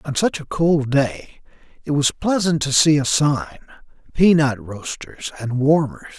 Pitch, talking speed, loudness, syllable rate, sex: 145 Hz, 155 wpm, -19 LUFS, 4.2 syllables/s, male